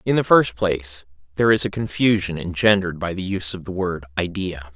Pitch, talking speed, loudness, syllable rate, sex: 90 Hz, 200 wpm, -21 LUFS, 5.9 syllables/s, male